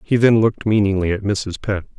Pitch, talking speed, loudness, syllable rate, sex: 100 Hz, 210 wpm, -18 LUFS, 5.9 syllables/s, male